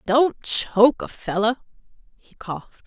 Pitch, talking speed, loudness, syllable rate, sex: 235 Hz, 125 wpm, -21 LUFS, 4.7 syllables/s, female